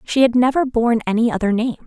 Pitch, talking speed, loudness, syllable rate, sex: 235 Hz, 225 wpm, -17 LUFS, 6.8 syllables/s, female